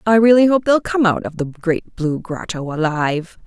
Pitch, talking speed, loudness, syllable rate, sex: 185 Hz, 210 wpm, -17 LUFS, 4.9 syllables/s, female